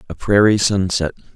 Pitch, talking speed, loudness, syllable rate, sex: 95 Hz, 135 wpm, -16 LUFS, 5.2 syllables/s, male